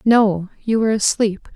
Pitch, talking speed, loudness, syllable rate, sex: 210 Hz, 155 wpm, -18 LUFS, 4.4 syllables/s, female